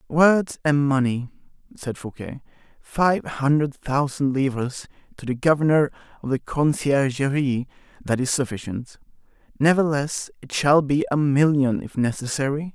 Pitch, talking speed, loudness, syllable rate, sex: 140 Hz, 120 wpm, -22 LUFS, 4.6 syllables/s, male